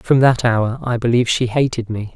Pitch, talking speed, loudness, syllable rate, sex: 120 Hz, 225 wpm, -17 LUFS, 5.3 syllables/s, male